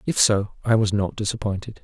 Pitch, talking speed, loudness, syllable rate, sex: 105 Hz, 195 wpm, -22 LUFS, 5.7 syllables/s, male